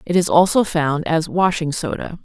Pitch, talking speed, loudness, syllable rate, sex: 165 Hz, 190 wpm, -18 LUFS, 4.8 syllables/s, female